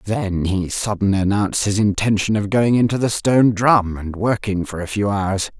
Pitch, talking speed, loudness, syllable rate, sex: 105 Hz, 195 wpm, -18 LUFS, 5.0 syllables/s, female